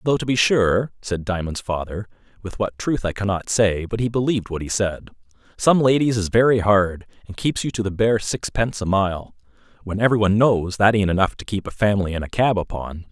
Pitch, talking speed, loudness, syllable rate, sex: 105 Hz, 210 wpm, -20 LUFS, 5.6 syllables/s, male